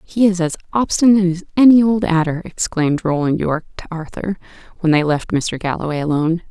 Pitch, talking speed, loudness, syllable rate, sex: 175 Hz, 175 wpm, -17 LUFS, 6.1 syllables/s, female